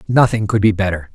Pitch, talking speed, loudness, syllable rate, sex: 105 Hz, 210 wpm, -16 LUFS, 6.1 syllables/s, male